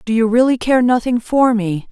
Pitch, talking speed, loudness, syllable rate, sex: 235 Hz, 220 wpm, -15 LUFS, 5.0 syllables/s, female